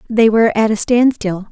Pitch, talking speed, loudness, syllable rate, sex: 220 Hz, 195 wpm, -14 LUFS, 5.3 syllables/s, female